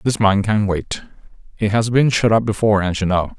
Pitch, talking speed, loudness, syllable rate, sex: 105 Hz, 230 wpm, -17 LUFS, 5.5 syllables/s, male